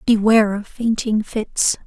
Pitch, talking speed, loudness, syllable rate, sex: 215 Hz, 130 wpm, -18 LUFS, 4.2 syllables/s, female